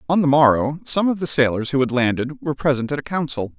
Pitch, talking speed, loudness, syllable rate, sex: 140 Hz, 250 wpm, -19 LUFS, 6.3 syllables/s, male